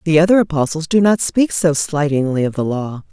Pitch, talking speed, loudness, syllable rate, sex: 160 Hz, 210 wpm, -16 LUFS, 5.4 syllables/s, female